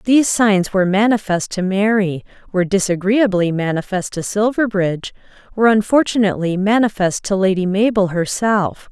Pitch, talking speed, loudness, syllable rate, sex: 200 Hz, 110 wpm, -17 LUFS, 5.3 syllables/s, female